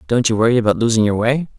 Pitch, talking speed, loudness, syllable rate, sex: 115 Hz, 265 wpm, -16 LUFS, 7.4 syllables/s, male